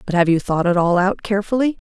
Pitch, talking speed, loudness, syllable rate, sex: 195 Hz, 255 wpm, -18 LUFS, 6.5 syllables/s, female